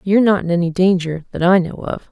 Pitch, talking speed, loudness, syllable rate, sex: 180 Hz, 255 wpm, -17 LUFS, 6.2 syllables/s, female